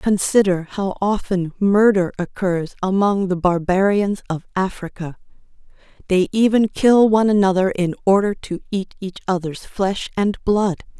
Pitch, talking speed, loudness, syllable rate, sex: 195 Hz, 130 wpm, -19 LUFS, 4.4 syllables/s, female